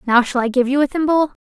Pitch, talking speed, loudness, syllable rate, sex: 265 Hz, 290 wpm, -17 LUFS, 6.5 syllables/s, female